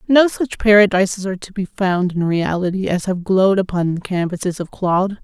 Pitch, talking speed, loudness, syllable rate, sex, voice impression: 190 Hz, 195 wpm, -18 LUFS, 5.4 syllables/s, female, very feminine, slightly gender-neutral, very adult-like, middle-aged, slightly thin, tensed, powerful, bright, hard, very clear, fluent, slightly cool, intellectual, very refreshing, very sincere, calm, friendly, reassuring, slightly unique, wild, lively, slightly kind, slightly intense, slightly sharp